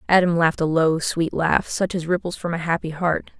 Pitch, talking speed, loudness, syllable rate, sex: 170 Hz, 230 wpm, -21 LUFS, 5.4 syllables/s, female